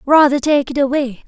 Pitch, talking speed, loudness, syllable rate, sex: 275 Hz, 190 wpm, -15 LUFS, 5.3 syllables/s, female